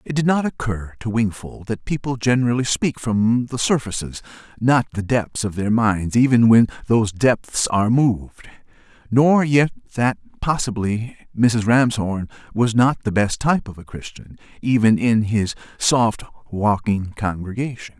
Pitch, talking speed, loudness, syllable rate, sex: 115 Hz, 150 wpm, -19 LUFS, 4.5 syllables/s, male